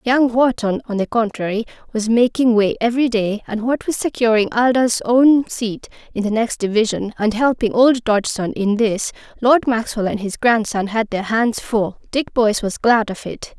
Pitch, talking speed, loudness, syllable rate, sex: 230 Hz, 185 wpm, -18 LUFS, 4.7 syllables/s, female